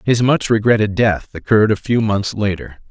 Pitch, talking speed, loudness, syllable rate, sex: 105 Hz, 185 wpm, -16 LUFS, 5.3 syllables/s, male